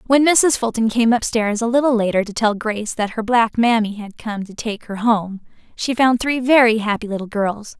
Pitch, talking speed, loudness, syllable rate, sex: 225 Hz, 225 wpm, -18 LUFS, 5.1 syllables/s, female